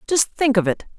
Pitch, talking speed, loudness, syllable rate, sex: 240 Hz, 245 wpm, -19 LUFS, 5.7 syllables/s, female